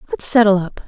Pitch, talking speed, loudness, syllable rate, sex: 200 Hz, 205 wpm, -15 LUFS, 5.8 syllables/s, female